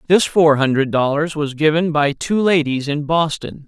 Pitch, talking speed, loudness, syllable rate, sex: 155 Hz, 180 wpm, -17 LUFS, 4.6 syllables/s, male